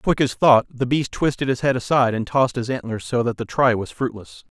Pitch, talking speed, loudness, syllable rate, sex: 125 Hz, 250 wpm, -20 LUFS, 5.7 syllables/s, male